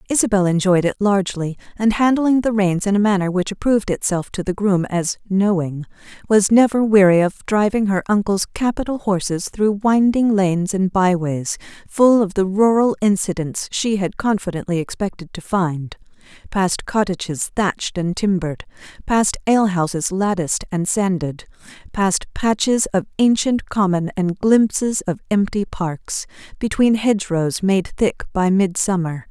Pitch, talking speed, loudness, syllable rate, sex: 195 Hz, 145 wpm, -18 LUFS, 4.7 syllables/s, female